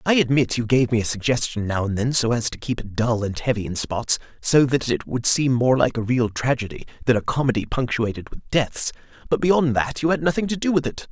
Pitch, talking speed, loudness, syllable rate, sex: 125 Hz, 250 wpm, -21 LUFS, 5.6 syllables/s, male